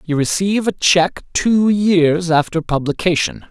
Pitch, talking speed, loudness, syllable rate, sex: 170 Hz, 135 wpm, -16 LUFS, 4.5 syllables/s, male